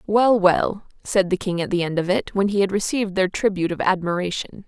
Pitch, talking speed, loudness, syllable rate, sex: 190 Hz, 230 wpm, -21 LUFS, 5.8 syllables/s, female